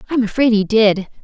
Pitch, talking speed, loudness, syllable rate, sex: 220 Hz, 195 wpm, -15 LUFS, 5.5 syllables/s, female